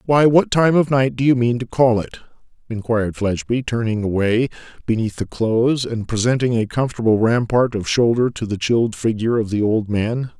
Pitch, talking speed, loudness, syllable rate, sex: 115 Hz, 190 wpm, -18 LUFS, 5.5 syllables/s, male